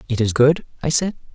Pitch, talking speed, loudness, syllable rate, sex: 135 Hz, 225 wpm, -19 LUFS, 6.0 syllables/s, male